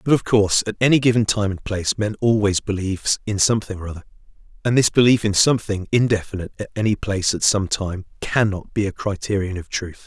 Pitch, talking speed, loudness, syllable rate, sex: 105 Hz, 205 wpm, -20 LUFS, 6.5 syllables/s, male